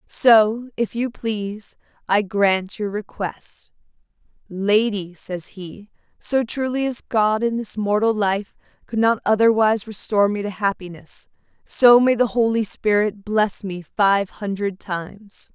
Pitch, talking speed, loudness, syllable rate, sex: 210 Hz, 140 wpm, -20 LUFS, 4.0 syllables/s, female